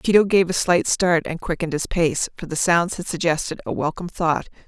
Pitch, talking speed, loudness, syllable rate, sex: 170 Hz, 220 wpm, -21 LUFS, 5.5 syllables/s, female